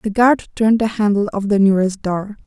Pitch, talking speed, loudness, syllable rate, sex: 210 Hz, 220 wpm, -17 LUFS, 5.9 syllables/s, female